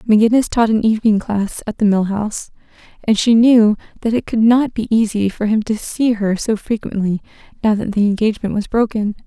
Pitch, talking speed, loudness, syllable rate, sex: 215 Hz, 200 wpm, -16 LUFS, 5.7 syllables/s, female